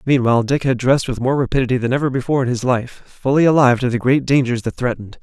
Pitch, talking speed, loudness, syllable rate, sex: 130 Hz, 240 wpm, -17 LUFS, 7.1 syllables/s, male